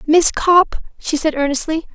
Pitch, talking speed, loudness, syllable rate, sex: 315 Hz, 155 wpm, -16 LUFS, 4.4 syllables/s, female